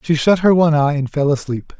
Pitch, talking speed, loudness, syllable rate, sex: 150 Hz, 270 wpm, -15 LUFS, 5.9 syllables/s, male